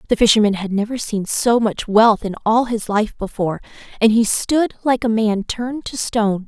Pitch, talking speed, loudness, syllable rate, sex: 220 Hz, 205 wpm, -18 LUFS, 5.0 syllables/s, female